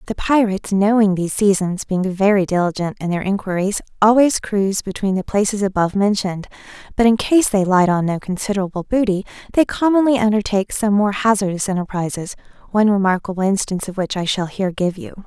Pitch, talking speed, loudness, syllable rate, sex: 200 Hz, 175 wpm, -18 LUFS, 5.5 syllables/s, female